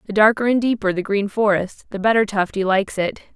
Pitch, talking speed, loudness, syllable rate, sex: 205 Hz, 215 wpm, -19 LUFS, 5.9 syllables/s, female